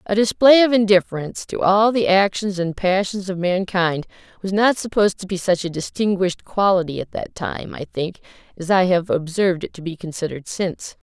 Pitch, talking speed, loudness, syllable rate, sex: 185 Hz, 190 wpm, -19 LUFS, 5.6 syllables/s, female